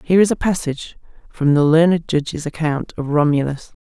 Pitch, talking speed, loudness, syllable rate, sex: 155 Hz, 170 wpm, -18 LUFS, 5.8 syllables/s, female